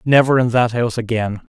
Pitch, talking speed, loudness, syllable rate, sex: 120 Hz, 195 wpm, -17 LUFS, 6.0 syllables/s, male